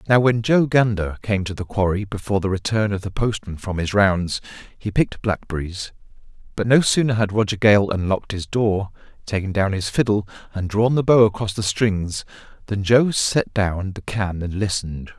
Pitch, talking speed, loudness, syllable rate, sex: 100 Hz, 190 wpm, -20 LUFS, 5.1 syllables/s, male